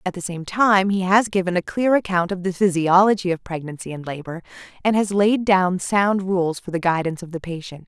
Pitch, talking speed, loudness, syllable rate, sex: 185 Hz, 220 wpm, -20 LUFS, 5.4 syllables/s, female